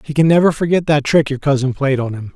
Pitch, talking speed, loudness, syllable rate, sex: 145 Hz, 280 wpm, -15 LUFS, 6.2 syllables/s, male